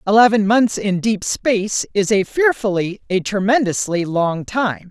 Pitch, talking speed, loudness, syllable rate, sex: 205 Hz, 145 wpm, -17 LUFS, 4.3 syllables/s, female